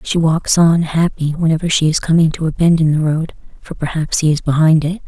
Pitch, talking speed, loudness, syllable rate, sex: 160 Hz, 235 wpm, -15 LUFS, 5.5 syllables/s, female